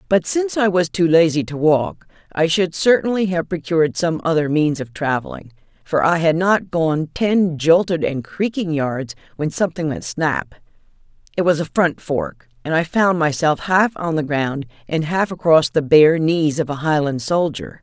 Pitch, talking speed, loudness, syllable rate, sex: 160 Hz, 180 wpm, -18 LUFS, 4.6 syllables/s, female